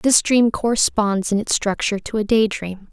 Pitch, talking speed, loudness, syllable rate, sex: 215 Hz, 205 wpm, -19 LUFS, 4.9 syllables/s, female